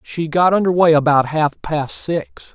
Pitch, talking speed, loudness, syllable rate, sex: 150 Hz, 190 wpm, -16 LUFS, 4.2 syllables/s, male